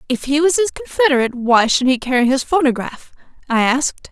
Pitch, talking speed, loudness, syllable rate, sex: 275 Hz, 190 wpm, -16 LUFS, 6.9 syllables/s, female